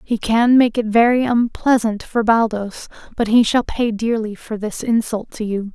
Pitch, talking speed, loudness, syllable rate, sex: 225 Hz, 190 wpm, -17 LUFS, 4.5 syllables/s, female